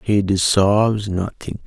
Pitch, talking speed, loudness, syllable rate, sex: 100 Hz, 110 wpm, -18 LUFS, 3.9 syllables/s, male